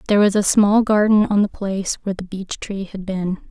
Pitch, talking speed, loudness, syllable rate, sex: 200 Hz, 240 wpm, -19 LUFS, 5.7 syllables/s, female